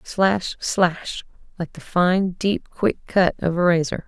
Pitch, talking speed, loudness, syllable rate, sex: 175 Hz, 160 wpm, -21 LUFS, 3.4 syllables/s, female